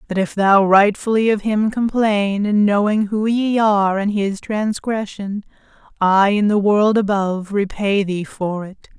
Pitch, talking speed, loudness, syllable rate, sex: 205 Hz, 160 wpm, -17 LUFS, 4.2 syllables/s, female